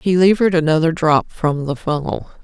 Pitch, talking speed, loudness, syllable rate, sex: 165 Hz, 170 wpm, -17 LUFS, 5.2 syllables/s, female